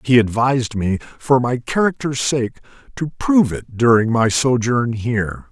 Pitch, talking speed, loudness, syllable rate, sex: 125 Hz, 150 wpm, -18 LUFS, 4.6 syllables/s, male